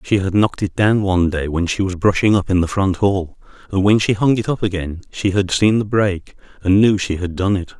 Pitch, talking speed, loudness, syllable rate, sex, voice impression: 95 Hz, 260 wpm, -17 LUFS, 5.4 syllables/s, male, very masculine, very adult-like, middle-aged, very thick, slightly tensed, slightly powerful, slightly dark, soft, muffled, slightly fluent, very cool, very intellectual, very sincere, very calm, very mature, friendly, very reassuring, slightly unique, elegant, sweet, very kind